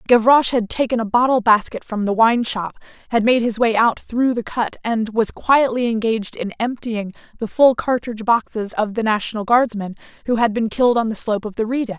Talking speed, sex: 225 wpm, female